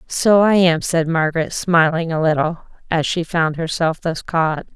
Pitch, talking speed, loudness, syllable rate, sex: 165 Hz, 175 wpm, -17 LUFS, 4.5 syllables/s, female